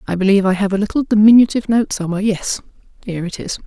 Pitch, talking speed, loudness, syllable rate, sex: 205 Hz, 215 wpm, -16 LUFS, 7.9 syllables/s, female